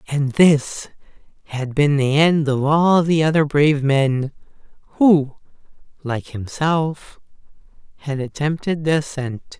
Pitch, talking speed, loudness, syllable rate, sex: 145 Hz, 120 wpm, -18 LUFS, 3.8 syllables/s, male